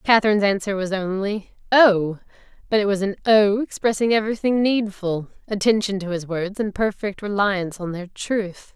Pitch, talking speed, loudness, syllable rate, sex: 205 Hz, 150 wpm, -21 LUFS, 5.1 syllables/s, female